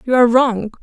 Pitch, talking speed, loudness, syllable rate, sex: 240 Hz, 215 wpm, -14 LUFS, 6.5 syllables/s, female